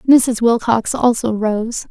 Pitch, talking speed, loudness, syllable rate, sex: 230 Hz, 125 wpm, -16 LUFS, 3.5 syllables/s, female